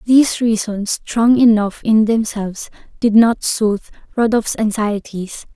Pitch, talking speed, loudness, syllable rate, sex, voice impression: 220 Hz, 120 wpm, -16 LUFS, 4.2 syllables/s, female, feminine, very young, weak, raspy, slightly cute, kind, modest, light